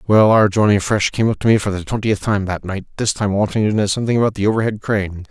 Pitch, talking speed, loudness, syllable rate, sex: 105 Hz, 270 wpm, -17 LUFS, 6.6 syllables/s, male